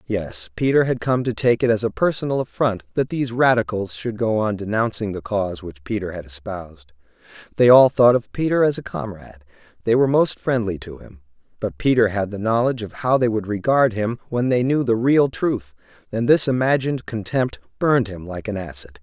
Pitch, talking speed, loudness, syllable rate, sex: 110 Hz, 200 wpm, -20 LUFS, 5.6 syllables/s, male